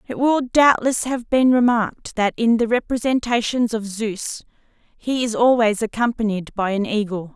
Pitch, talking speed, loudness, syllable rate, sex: 225 Hz, 155 wpm, -19 LUFS, 4.6 syllables/s, female